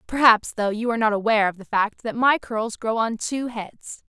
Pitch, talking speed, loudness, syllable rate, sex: 225 Hz, 235 wpm, -22 LUFS, 5.2 syllables/s, female